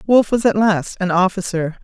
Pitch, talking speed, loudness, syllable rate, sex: 195 Hz, 195 wpm, -17 LUFS, 5.4 syllables/s, female